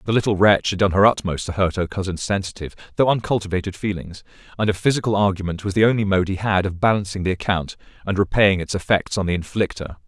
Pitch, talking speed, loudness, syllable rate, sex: 95 Hz, 215 wpm, -20 LUFS, 6.6 syllables/s, male